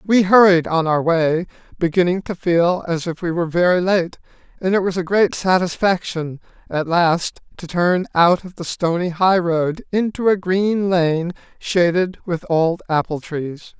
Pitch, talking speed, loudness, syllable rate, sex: 175 Hz, 165 wpm, -18 LUFS, 4.3 syllables/s, male